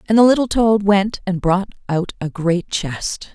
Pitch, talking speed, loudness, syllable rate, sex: 195 Hz, 195 wpm, -18 LUFS, 4.2 syllables/s, female